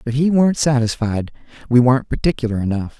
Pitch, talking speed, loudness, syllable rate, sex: 130 Hz, 160 wpm, -17 LUFS, 5.6 syllables/s, male